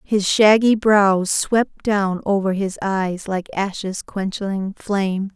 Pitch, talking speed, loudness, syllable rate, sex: 195 Hz, 135 wpm, -19 LUFS, 3.3 syllables/s, female